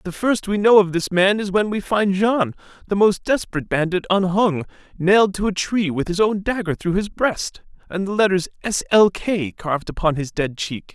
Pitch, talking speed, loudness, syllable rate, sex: 190 Hz, 215 wpm, -20 LUFS, 5.1 syllables/s, male